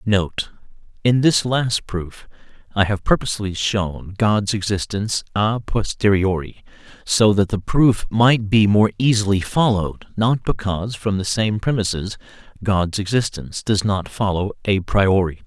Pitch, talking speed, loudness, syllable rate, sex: 105 Hz, 130 wpm, -19 LUFS, 4.4 syllables/s, male